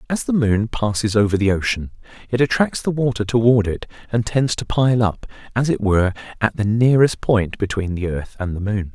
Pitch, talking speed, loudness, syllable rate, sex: 110 Hz, 210 wpm, -19 LUFS, 5.4 syllables/s, male